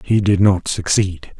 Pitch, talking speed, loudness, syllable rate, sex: 95 Hz, 170 wpm, -17 LUFS, 3.9 syllables/s, male